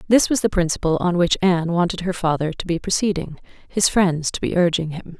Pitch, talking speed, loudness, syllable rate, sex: 175 Hz, 220 wpm, -20 LUFS, 5.8 syllables/s, female